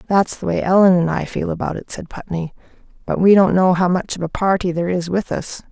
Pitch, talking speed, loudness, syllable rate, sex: 180 Hz, 250 wpm, -18 LUFS, 5.9 syllables/s, female